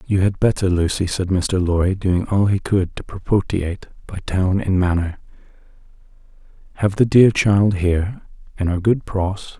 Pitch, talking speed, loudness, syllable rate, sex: 95 Hz, 165 wpm, -19 LUFS, 4.7 syllables/s, male